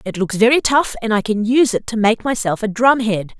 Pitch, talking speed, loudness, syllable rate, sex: 225 Hz, 250 wpm, -16 LUFS, 5.6 syllables/s, female